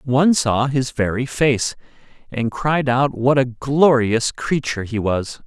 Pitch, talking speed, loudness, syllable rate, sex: 130 Hz, 155 wpm, -19 LUFS, 4.0 syllables/s, male